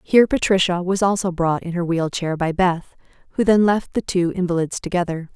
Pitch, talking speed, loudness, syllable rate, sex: 180 Hz, 200 wpm, -20 LUFS, 5.4 syllables/s, female